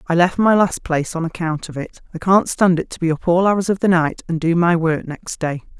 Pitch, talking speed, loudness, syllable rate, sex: 170 Hz, 280 wpm, -18 LUFS, 5.4 syllables/s, female